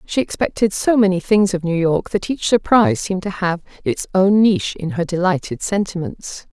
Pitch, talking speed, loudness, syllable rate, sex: 185 Hz, 195 wpm, -18 LUFS, 5.3 syllables/s, female